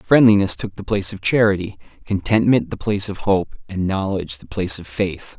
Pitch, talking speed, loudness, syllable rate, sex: 95 Hz, 190 wpm, -20 LUFS, 5.6 syllables/s, male